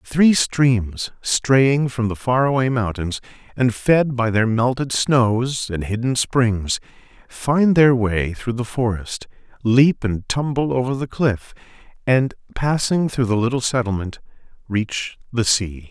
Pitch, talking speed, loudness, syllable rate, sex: 120 Hz, 145 wpm, -19 LUFS, 3.7 syllables/s, male